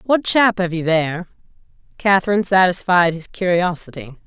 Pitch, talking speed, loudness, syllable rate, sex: 180 Hz, 125 wpm, -17 LUFS, 5.3 syllables/s, female